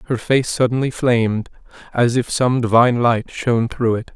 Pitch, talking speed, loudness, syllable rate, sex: 120 Hz, 175 wpm, -18 LUFS, 5.1 syllables/s, male